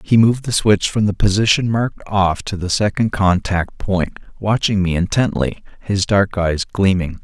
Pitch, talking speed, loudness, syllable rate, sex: 100 Hz, 175 wpm, -17 LUFS, 4.7 syllables/s, male